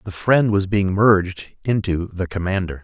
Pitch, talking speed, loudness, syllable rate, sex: 95 Hz, 170 wpm, -19 LUFS, 4.6 syllables/s, male